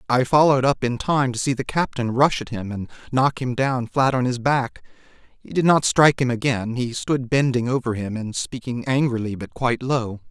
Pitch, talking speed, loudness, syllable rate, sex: 125 Hz, 215 wpm, -21 LUFS, 5.2 syllables/s, male